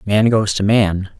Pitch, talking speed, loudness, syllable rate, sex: 105 Hz, 200 wpm, -15 LUFS, 3.9 syllables/s, male